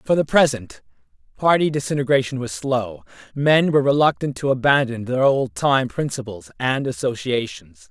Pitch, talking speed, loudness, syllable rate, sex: 135 Hz, 135 wpm, -20 LUFS, 4.9 syllables/s, male